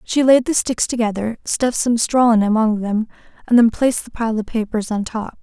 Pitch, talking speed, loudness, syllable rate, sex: 225 Hz, 220 wpm, -18 LUFS, 5.4 syllables/s, female